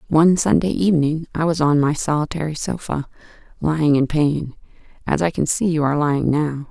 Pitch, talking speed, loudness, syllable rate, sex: 155 Hz, 160 wpm, -19 LUFS, 5.7 syllables/s, female